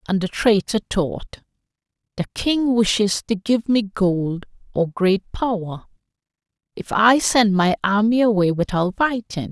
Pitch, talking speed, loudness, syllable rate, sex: 205 Hz, 140 wpm, -19 LUFS, 4.1 syllables/s, female